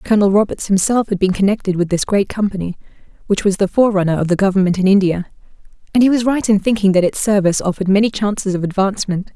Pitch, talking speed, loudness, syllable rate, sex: 200 Hz, 205 wpm, -16 LUFS, 7.0 syllables/s, female